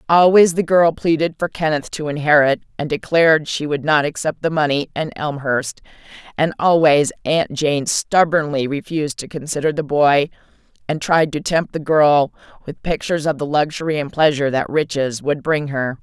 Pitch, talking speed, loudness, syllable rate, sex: 150 Hz, 170 wpm, -18 LUFS, 5.0 syllables/s, female